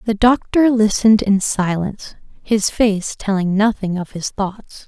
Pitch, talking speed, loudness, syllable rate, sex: 205 Hz, 150 wpm, -17 LUFS, 4.3 syllables/s, female